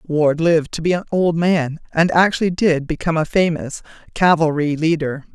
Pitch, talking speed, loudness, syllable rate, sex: 160 Hz, 170 wpm, -18 LUFS, 5.3 syllables/s, female